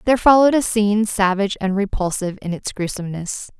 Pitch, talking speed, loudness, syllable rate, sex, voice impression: 205 Hz, 165 wpm, -19 LUFS, 6.5 syllables/s, female, very feminine, very young, very thin, very tensed, powerful, very bright, very hard, very clear, fluent, very cute, intellectual, very refreshing, sincere, slightly calm, very friendly, slightly reassuring, very unique, elegant, sweet, very lively, strict, slightly intense, sharp